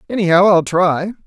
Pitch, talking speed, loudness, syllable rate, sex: 185 Hz, 140 wpm, -14 LUFS, 5.2 syllables/s, male